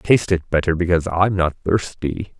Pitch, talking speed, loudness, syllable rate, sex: 90 Hz, 175 wpm, -19 LUFS, 5.3 syllables/s, male